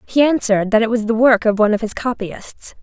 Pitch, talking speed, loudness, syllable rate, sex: 225 Hz, 255 wpm, -16 LUFS, 6.0 syllables/s, female